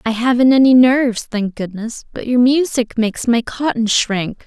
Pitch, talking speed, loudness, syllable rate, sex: 240 Hz, 175 wpm, -15 LUFS, 4.7 syllables/s, female